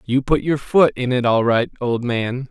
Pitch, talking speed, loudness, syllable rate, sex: 125 Hz, 240 wpm, -18 LUFS, 4.5 syllables/s, male